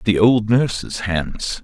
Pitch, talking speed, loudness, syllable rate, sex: 105 Hz, 145 wpm, -18 LUFS, 3.3 syllables/s, male